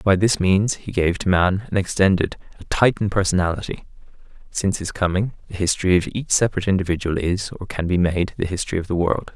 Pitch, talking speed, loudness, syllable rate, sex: 95 Hz, 200 wpm, -21 LUFS, 6.1 syllables/s, male